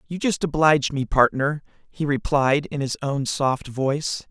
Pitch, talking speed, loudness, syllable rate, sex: 145 Hz, 165 wpm, -22 LUFS, 4.5 syllables/s, male